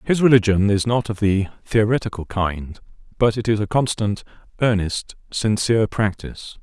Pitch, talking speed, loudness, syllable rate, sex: 105 Hz, 145 wpm, -20 LUFS, 4.9 syllables/s, male